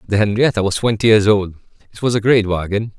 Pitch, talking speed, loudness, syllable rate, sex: 105 Hz, 220 wpm, -16 LUFS, 6.1 syllables/s, male